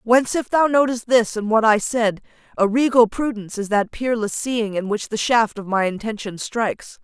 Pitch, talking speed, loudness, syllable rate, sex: 225 Hz, 205 wpm, -20 LUFS, 5.1 syllables/s, female